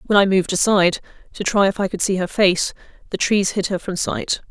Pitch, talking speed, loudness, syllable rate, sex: 190 Hz, 240 wpm, -19 LUFS, 5.7 syllables/s, female